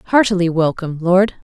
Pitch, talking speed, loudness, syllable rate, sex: 185 Hz, 115 wpm, -16 LUFS, 5.5 syllables/s, female